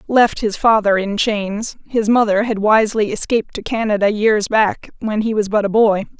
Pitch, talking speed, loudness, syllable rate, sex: 215 Hz, 195 wpm, -16 LUFS, 4.9 syllables/s, female